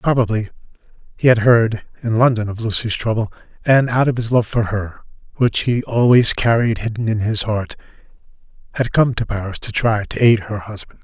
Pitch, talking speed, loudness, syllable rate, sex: 115 Hz, 185 wpm, -17 LUFS, 5.2 syllables/s, male